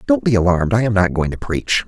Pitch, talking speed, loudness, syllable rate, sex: 100 Hz, 290 wpm, -17 LUFS, 6.3 syllables/s, male